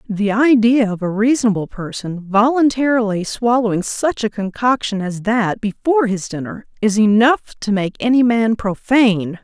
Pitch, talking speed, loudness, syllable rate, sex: 220 Hz, 145 wpm, -17 LUFS, 4.8 syllables/s, female